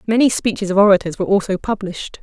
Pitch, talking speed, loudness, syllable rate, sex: 200 Hz, 190 wpm, -17 LUFS, 7.2 syllables/s, female